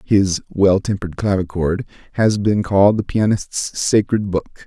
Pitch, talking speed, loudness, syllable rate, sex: 100 Hz, 140 wpm, -18 LUFS, 4.3 syllables/s, male